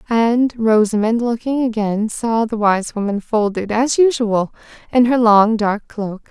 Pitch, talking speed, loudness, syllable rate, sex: 225 Hz, 150 wpm, -17 LUFS, 4.0 syllables/s, female